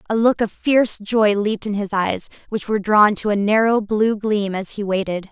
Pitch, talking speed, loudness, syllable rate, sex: 210 Hz, 225 wpm, -19 LUFS, 5.1 syllables/s, female